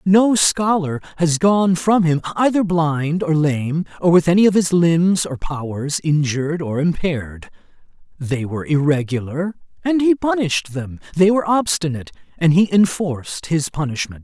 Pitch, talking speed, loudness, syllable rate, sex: 165 Hz, 150 wpm, -18 LUFS, 4.7 syllables/s, male